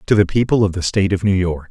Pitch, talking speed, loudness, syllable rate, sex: 95 Hz, 315 wpm, -17 LUFS, 6.9 syllables/s, male